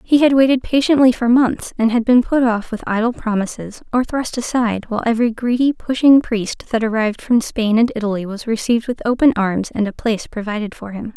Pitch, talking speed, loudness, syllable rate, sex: 230 Hz, 210 wpm, -17 LUFS, 5.8 syllables/s, female